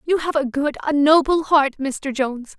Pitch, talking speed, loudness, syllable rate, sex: 290 Hz, 185 wpm, -19 LUFS, 4.9 syllables/s, female